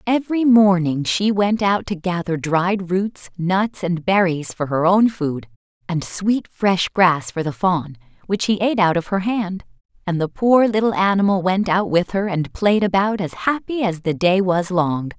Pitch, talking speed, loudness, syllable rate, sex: 185 Hz, 195 wpm, -19 LUFS, 4.3 syllables/s, female